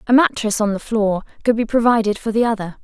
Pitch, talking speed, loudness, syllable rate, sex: 220 Hz, 235 wpm, -18 LUFS, 6.0 syllables/s, female